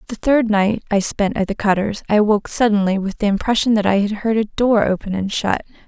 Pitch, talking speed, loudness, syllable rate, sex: 210 Hz, 235 wpm, -18 LUFS, 5.8 syllables/s, female